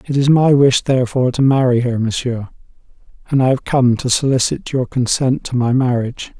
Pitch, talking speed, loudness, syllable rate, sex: 125 Hz, 190 wpm, -16 LUFS, 5.5 syllables/s, male